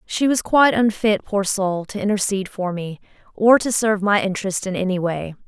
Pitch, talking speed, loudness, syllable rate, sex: 200 Hz, 195 wpm, -19 LUFS, 5.5 syllables/s, female